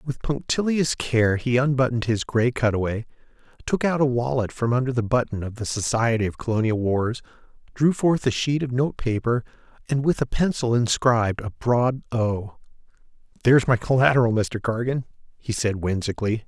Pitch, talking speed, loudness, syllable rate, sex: 120 Hz, 165 wpm, -23 LUFS, 5.2 syllables/s, male